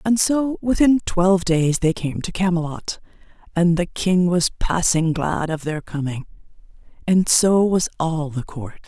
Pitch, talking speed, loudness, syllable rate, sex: 175 Hz, 160 wpm, -20 LUFS, 4.2 syllables/s, female